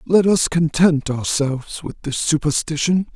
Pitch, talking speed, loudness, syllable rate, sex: 155 Hz, 135 wpm, -19 LUFS, 4.3 syllables/s, male